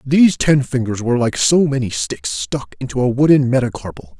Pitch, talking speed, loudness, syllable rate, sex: 130 Hz, 185 wpm, -16 LUFS, 5.4 syllables/s, male